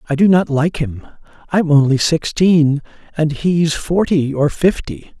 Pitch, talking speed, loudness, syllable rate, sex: 155 Hz, 150 wpm, -15 LUFS, 3.9 syllables/s, male